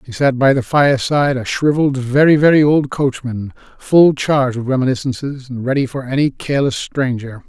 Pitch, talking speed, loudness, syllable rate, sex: 135 Hz, 170 wpm, -15 LUFS, 5.5 syllables/s, male